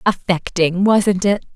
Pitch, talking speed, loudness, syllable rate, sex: 190 Hz, 115 wpm, -17 LUFS, 3.7 syllables/s, female